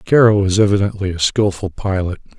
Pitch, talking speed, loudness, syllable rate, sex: 100 Hz, 150 wpm, -16 LUFS, 5.6 syllables/s, male